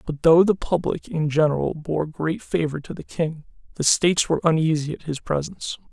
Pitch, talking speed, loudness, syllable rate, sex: 160 Hz, 195 wpm, -22 LUFS, 5.4 syllables/s, male